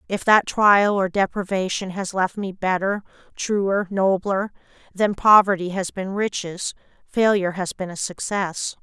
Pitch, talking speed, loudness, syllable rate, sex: 195 Hz, 135 wpm, -21 LUFS, 4.3 syllables/s, female